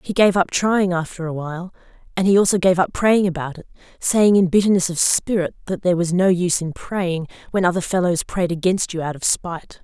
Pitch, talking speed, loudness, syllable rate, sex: 180 Hz, 215 wpm, -19 LUFS, 5.7 syllables/s, female